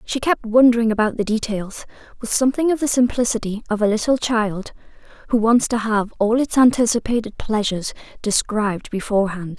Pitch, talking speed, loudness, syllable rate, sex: 225 Hz, 155 wpm, -19 LUFS, 5.6 syllables/s, female